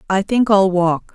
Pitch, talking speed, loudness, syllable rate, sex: 195 Hz, 210 wpm, -16 LUFS, 4.1 syllables/s, female